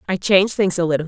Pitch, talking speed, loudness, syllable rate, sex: 180 Hz, 280 wpm, -17 LUFS, 7.5 syllables/s, female